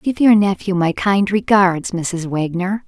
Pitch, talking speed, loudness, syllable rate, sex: 190 Hz, 165 wpm, -16 LUFS, 3.9 syllables/s, female